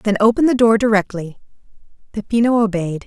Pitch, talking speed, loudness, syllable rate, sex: 210 Hz, 135 wpm, -16 LUFS, 5.8 syllables/s, female